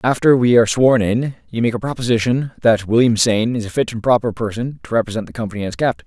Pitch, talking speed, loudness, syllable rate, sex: 115 Hz, 240 wpm, -17 LUFS, 6.5 syllables/s, male